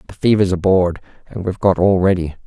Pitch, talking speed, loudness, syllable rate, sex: 95 Hz, 195 wpm, -16 LUFS, 6.2 syllables/s, male